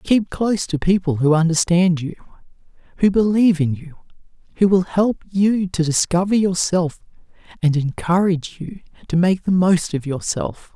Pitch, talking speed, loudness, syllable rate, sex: 175 Hz, 150 wpm, -18 LUFS, 4.7 syllables/s, male